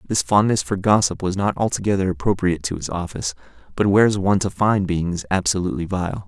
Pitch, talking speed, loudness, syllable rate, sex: 95 Hz, 190 wpm, -20 LUFS, 6.5 syllables/s, male